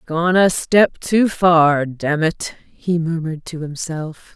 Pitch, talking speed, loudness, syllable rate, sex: 165 Hz, 150 wpm, -17 LUFS, 3.4 syllables/s, female